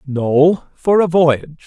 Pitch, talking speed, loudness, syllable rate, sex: 155 Hz, 145 wpm, -15 LUFS, 3.4 syllables/s, male